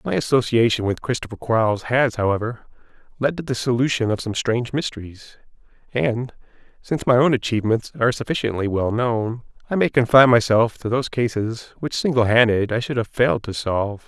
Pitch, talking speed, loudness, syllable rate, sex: 120 Hz, 170 wpm, -20 LUFS, 5.8 syllables/s, male